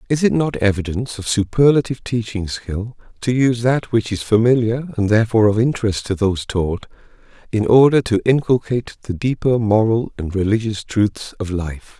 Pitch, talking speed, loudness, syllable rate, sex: 110 Hz, 165 wpm, -18 LUFS, 5.4 syllables/s, male